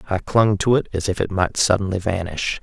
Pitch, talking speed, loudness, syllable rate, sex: 100 Hz, 230 wpm, -20 LUFS, 5.4 syllables/s, male